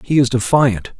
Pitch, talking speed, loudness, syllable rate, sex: 125 Hz, 180 wpm, -15 LUFS, 4.6 syllables/s, male